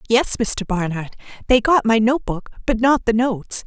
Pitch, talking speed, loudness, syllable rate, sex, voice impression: 225 Hz, 195 wpm, -19 LUFS, 4.9 syllables/s, female, feminine, adult-like, slightly fluent, sincere, friendly